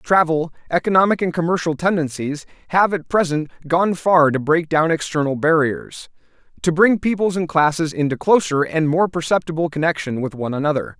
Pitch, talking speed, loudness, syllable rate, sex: 165 Hz, 160 wpm, -18 LUFS, 5.4 syllables/s, male